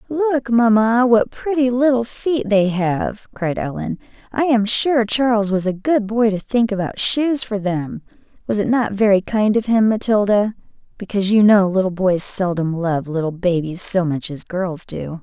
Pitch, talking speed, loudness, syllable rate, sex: 210 Hz, 175 wpm, -18 LUFS, 4.5 syllables/s, female